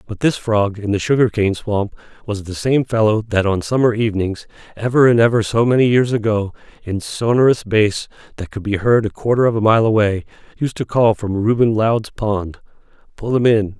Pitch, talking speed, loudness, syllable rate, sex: 110 Hz, 200 wpm, -17 LUFS, 5.2 syllables/s, male